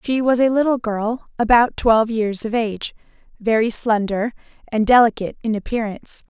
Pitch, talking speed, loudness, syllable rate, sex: 225 Hz, 150 wpm, -19 LUFS, 5.4 syllables/s, female